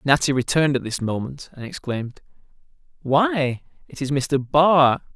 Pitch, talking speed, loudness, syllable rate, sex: 135 Hz, 140 wpm, -21 LUFS, 4.6 syllables/s, male